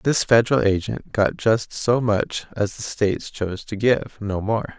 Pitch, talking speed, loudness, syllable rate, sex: 110 Hz, 175 wpm, -21 LUFS, 4.5 syllables/s, male